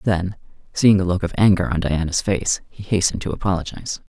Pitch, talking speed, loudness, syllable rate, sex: 90 Hz, 190 wpm, -20 LUFS, 6.0 syllables/s, male